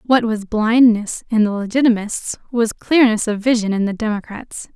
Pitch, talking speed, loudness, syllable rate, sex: 225 Hz, 165 wpm, -17 LUFS, 4.7 syllables/s, female